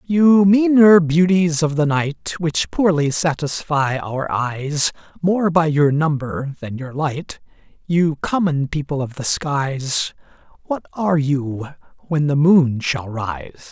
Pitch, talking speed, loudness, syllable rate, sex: 155 Hz, 140 wpm, -18 LUFS, 3.5 syllables/s, male